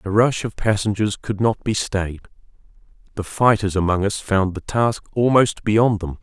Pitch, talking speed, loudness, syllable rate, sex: 105 Hz, 175 wpm, -20 LUFS, 4.5 syllables/s, male